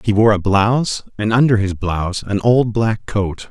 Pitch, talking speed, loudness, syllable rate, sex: 105 Hz, 205 wpm, -17 LUFS, 4.6 syllables/s, male